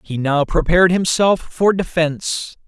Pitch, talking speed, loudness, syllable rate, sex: 170 Hz, 135 wpm, -17 LUFS, 4.4 syllables/s, male